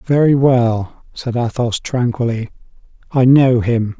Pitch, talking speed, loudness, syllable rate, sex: 120 Hz, 120 wpm, -15 LUFS, 3.8 syllables/s, male